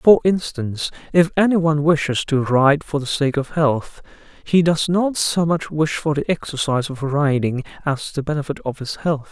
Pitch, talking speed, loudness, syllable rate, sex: 150 Hz, 185 wpm, -19 LUFS, 4.9 syllables/s, male